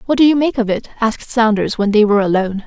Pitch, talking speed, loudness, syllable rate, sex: 225 Hz, 270 wpm, -15 LUFS, 7.1 syllables/s, female